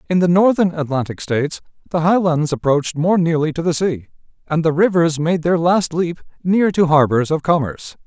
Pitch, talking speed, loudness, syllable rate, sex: 160 Hz, 185 wpm, -17 LUFS, 5.3 syllables/s, male